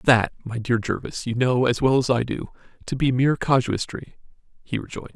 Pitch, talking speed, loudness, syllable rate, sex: 125 Hz, 200 wpm, -23 LUFS, 5.5 syllables/s, male